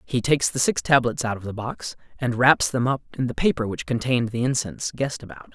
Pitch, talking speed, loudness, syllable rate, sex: 120 Hz, 240 wpm, -23 LUFS, 6.2 syllables/s, male